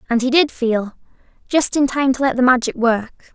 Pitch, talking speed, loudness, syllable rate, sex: 255 Hz, 195 wpm, -17 LUFS, 5.4 syllables/s, female